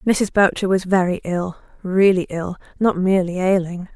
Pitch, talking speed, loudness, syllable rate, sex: 185 Hz, 135 wpm, -19 LUFS, 4.8 syllables/s, female